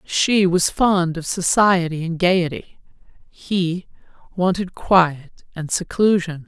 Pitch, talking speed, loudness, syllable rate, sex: 175 Hz, 110 wpm, -19 LUFS, 3.4 syllables/s, female